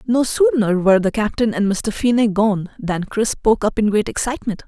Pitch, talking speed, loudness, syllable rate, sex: 215 Hz, 205 wpm, -18 LUFS, 5.4 syllables/s, female